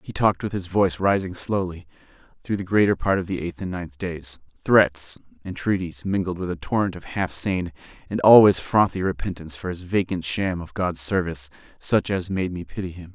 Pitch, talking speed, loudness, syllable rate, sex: 90 Hz, 190 wpm, -23 LUFS, 5.4 syllables/s, male